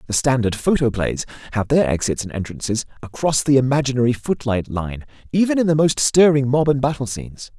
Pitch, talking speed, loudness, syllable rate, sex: 130 Hz, 175 wpm, -19 LUFS, 5.7 syllables/s, male